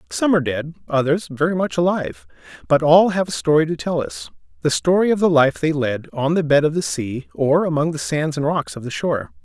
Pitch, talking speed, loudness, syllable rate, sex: 145 Hz, 230 wpm, -19 LUFS, 5.6 syllables/s, male